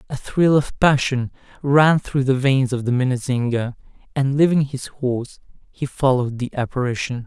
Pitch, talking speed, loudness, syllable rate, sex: 130 Hz, 155 wpm, -20 LUFS, 4.9 syllables/s, male